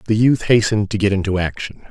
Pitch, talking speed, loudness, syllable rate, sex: 105 Hz, 220 wpm, -17 LUFS, 6.6 syllables/s, male